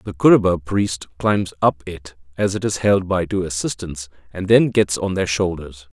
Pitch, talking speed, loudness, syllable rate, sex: 90 Hz, 190 wpm, -19 LUFS, 4.6 syllables/s, male